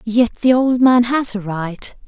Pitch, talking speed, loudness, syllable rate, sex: 230 Hz, 200 wpm, -16 LUFS, 3.7 syllables/s, female